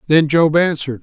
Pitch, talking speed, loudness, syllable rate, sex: 155 Hz, 175 wpm, -14 LUFS, 5.9 syllables/s, male